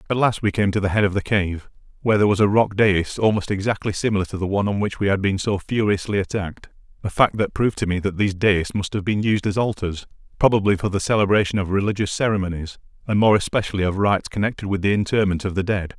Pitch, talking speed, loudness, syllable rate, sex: 100 Hz, 240 wpm, -21 LUFS, 6.7 syllables/s, male